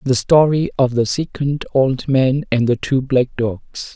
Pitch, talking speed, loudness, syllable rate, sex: 130 Hz, 180 wpm, -17 LUFS, 3.9 syllables/s, male